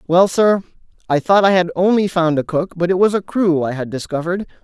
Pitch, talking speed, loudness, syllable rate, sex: 175 Hz, 235 wpm, -17 LUFS, 5.7 syllables/s, male